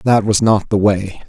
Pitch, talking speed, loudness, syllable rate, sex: 100 Hz, 235 wpm, -15 LUFS, 4.4 syllables/s, male